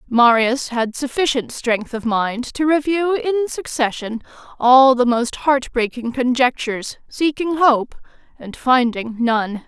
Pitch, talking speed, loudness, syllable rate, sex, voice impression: 255 Hz, 130 wpm, -18 LUFS, 3.9 syllables/s, female, feminine, adult-like, clear, slightly cool, slightly intellectual, slightly calm